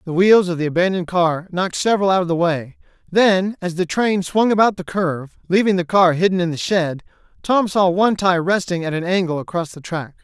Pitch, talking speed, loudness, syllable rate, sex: 180 Hz, 225 wpm, -18 LUFS, 5.7 syllables/s, male